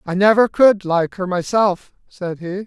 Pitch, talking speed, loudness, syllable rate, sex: 190 Hz, 180 wpm, -17 LUFS, 4.2 syllables/s, male